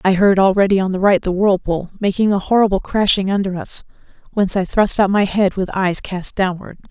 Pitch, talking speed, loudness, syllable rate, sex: 195 Hz, 210 wpm, -17 LUFS, 5.6 syllables/s, female